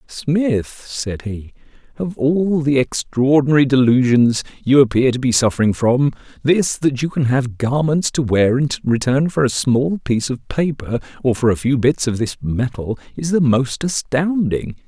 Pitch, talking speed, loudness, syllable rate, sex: 135 Hz, 170 wpm, -17 LUFS, 4.4 syllables/s, male